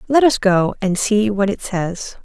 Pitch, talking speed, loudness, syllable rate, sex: 205 Hz, 215 wpm, -17 LUFS, 4.1 syllables/s, female